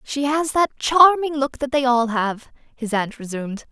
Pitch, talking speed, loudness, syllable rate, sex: 265 Hz, 195 wpm, -19 LUFS, 4.6 syllables/s, female